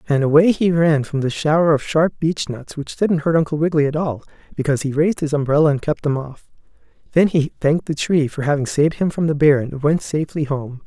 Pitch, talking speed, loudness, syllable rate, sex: 150 Hz, 235 wpm, -18 LUFS, 6.1 syllables/s, male